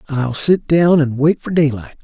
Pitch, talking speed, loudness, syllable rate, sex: 145 Hz, 205 wpm, -15 LUFS, 4.3 syllables/s, male